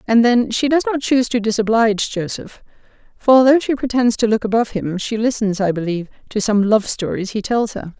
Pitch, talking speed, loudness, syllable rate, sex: 225 Hz, 210 wpm, -17 LUFS, 5.8 syllables/s, female